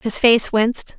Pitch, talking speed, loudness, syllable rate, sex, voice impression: 230 Hz, 185 wpm, -17 LUFS, 4.2 syllables/s, female, feminine, slightly young, tensed, clear, fluent, intellectual, calm, lively, slightly intense, sharp, light